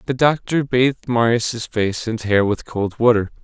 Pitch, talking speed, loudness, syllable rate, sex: 115 Hz, 175 wpm, -19 LUFS, 4.4 syllables/s, male